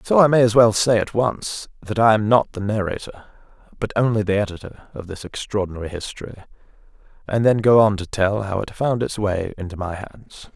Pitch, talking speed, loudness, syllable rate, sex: 105 Hz, 210 wpm, -20 LUFS, 5.5 syllables/s, male